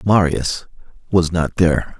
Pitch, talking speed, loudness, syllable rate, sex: 85 Hz, 120 wpm, -18 LUFS, 4.2 syllables/s, male